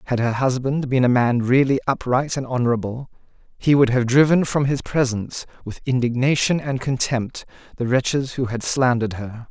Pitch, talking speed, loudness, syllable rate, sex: 125 Hz, 170 wpm, -20 LUFS, 5.3 syllables/s, male